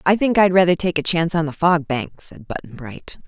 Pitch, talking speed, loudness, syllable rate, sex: 165 Hz, 255 wpm, -18 LUFS, 5.5 syllables/s, female